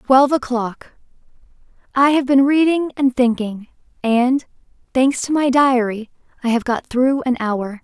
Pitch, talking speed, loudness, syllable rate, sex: 255 Hz, 140 wpm, -17 LUFS, 4.3 syllables/s, female